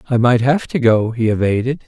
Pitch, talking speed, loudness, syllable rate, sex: 125 Hz, 225 wpm, -16 LUFS, 5.4 syllables/s, male